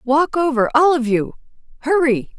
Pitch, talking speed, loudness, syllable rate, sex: 280 Hz, 100 wpm, -17 LUFS, 4.4 syllables/s, female